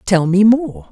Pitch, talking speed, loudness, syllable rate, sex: 195 Hz, 195 wpm, -13 LUFS, 3.9 syllables/s, female